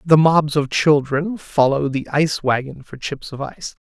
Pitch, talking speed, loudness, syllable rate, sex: 145 Hz, 185 wpm, -19 LUFS, 4.6 syllables/s, male